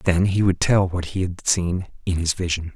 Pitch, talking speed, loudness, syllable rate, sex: 90 Hz, 240 wpm, -22 LUFS, 4.7 syllables/s, male